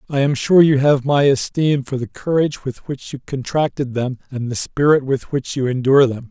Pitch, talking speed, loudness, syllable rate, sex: 135 Hz, 220 wpm, -18 LUFS, 5.2 syllables/s, male